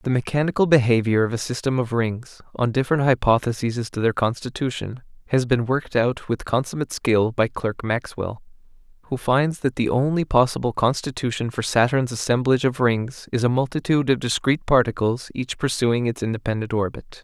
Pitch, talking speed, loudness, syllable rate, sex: 125 Hz, 165 wpm, -22 LUFS, 5.6 syllables/s, male